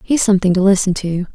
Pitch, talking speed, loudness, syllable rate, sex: 195 Hz, 225 wpm, -15 LUFS, 6.7 syllables/s, female